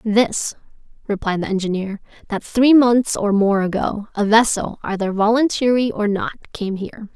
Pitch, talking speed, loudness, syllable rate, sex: 215 Hz, 150 wpm, -18 LUFS, 4.7 syllables/s, female